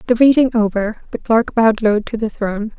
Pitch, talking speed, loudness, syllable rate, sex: 225 Hz, 215 wpm, -16 LUFS, 5.6 syllables/s, female